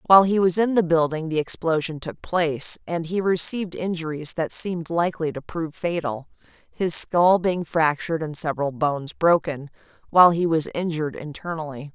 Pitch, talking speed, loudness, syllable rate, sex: 165 Hz, 165 wpm, -22 LUFS, 5.4 syllables/s, female